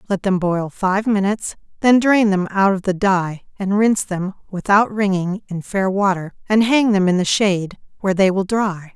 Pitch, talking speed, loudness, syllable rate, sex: 195 Hz, 200 wpm, -18 LUFS, 4.9 syllables/s, female